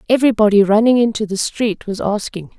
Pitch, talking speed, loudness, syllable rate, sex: 215 Hz, 160 wpm, -15 LUFS, 5.9 syllables/s, female